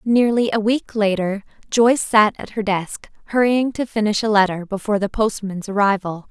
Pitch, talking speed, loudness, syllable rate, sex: 210 Hz, 170 wpm, -19 LUFS, 5.1 syllables/s, female